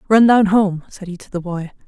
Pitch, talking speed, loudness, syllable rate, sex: 190 Hz, 255 wpm, -16 LUFS, 5.4 syllables/s, female